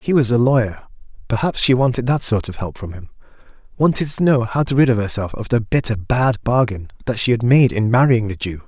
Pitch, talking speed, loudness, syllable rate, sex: 120 Hz, 230 wpm, -18 LUFS, 5.7 syllables/s, male